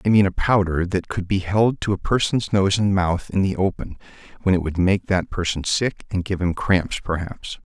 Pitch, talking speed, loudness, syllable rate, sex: 95 Hz, 225 wpm, -21 LUFS, 5.0 syllables/s, male